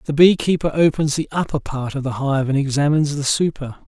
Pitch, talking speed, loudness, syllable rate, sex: 145 Hz, 195 wpm, -19 LUFS, 5.9 syllables/s, male